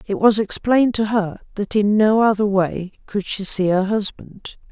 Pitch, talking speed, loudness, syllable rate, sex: 205 Hz, 190 wpm, -19 LUFS, 4.5 syllables/s, female